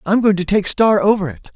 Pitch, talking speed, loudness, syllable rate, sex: 195 Hz, 270 wpm, -15 LUFS, 5.6 syllables/s, male